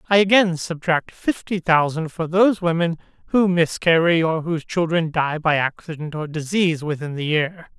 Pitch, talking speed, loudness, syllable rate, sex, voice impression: 165 Hz, 160 wpm, -20 LUFS, 5.0 syllables/s, male, masculine, adult-like, refreshing, slightly sincere, friendly, slightly unique